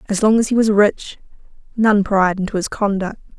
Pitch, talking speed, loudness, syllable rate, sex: 205 Hz, 195 wpm, -17 LUFS, 5.1 syllables/s, female